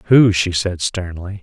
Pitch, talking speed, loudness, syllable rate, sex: 95 Hz, 170 wpm, -17 LUFS, 4.1 syllables/s, male